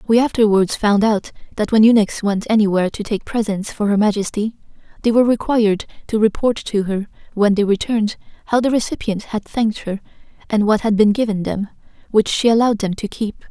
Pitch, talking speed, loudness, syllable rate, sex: 215 Hz, 190 wpm, -18 LUFS, 5.8 syllables/s, female